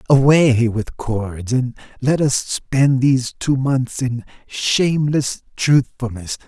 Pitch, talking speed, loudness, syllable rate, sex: 130 Hz, 120 wpm, -18 LUFS, 3.4 syllables/s, male